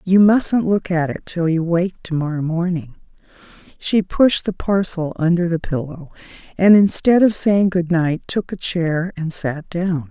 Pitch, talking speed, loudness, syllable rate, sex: 175 Hz, 170 wpm, -18 LUFS, 4.2 syllables/s, female